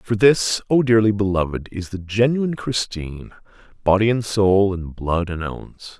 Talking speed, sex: 160 wpm, male